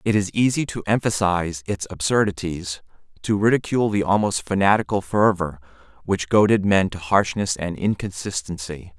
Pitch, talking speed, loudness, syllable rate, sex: 95 Hz, 135 wpm, -21 LUFS, 5.2 syllables/s, male